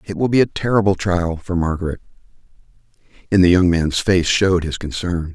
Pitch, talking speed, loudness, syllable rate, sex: 90 Hz, 180 wpm, -18 LUFS, 5.6 syllables/s, male